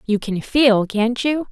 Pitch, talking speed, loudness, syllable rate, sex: 235 Hz, 195 wpm, -18 LUFS, 3.7 syllables/s, female